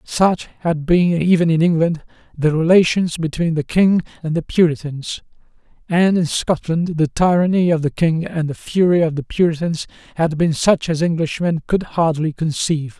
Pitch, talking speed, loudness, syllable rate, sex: 165 Hz, 165 wpm, -18 LUFS, 4.7 syllables/s, male